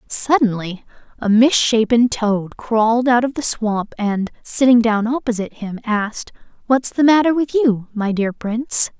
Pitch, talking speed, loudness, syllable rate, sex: 230 Hz, 155 wpm, -17 LUFS, 4.4 syllables/s, female